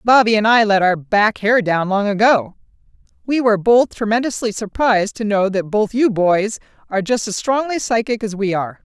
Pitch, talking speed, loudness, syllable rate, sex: 215 Hz, 190 wpm, -17 LUFS, 5.3 syllables/s, female